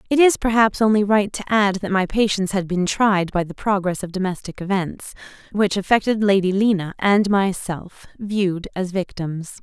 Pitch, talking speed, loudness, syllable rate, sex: 195 Hz, 170 wpm, -20 LUFS, 4.9 syllables/s, female